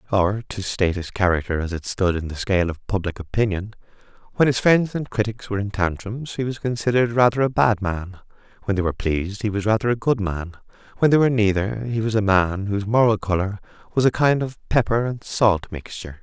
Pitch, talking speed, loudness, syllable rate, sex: 105 Hz, 215 wpm, -21 LUFS, 6.0 syllables/s, male